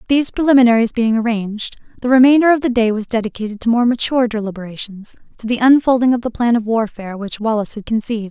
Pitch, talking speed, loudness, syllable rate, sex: 230 Hz, 190 wpm, -16 LUFS, 6.9 syllables/s, female